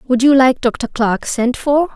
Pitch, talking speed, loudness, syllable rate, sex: 255 Hz, 215 wpm, -15 LUFS, 4.3 syllables/s, female